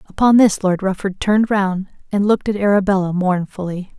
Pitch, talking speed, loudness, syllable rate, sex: 195 Hz, 165 wpm, -17 LUFS, 5.7 syllables/s, female